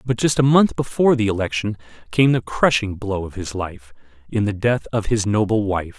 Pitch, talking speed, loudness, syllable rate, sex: 110 Hz, 210 wpm, -20 LUFS, 5.3 syllables/s, male